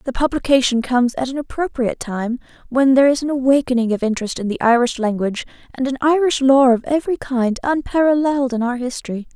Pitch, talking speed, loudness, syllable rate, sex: 260 Hz, 185 wpm, -18 LUFS, 6.3 syllables/s, female